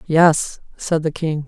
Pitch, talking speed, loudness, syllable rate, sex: 155 Hz, 165 wpm, -19 LUFS, 3.4 syllables/s, female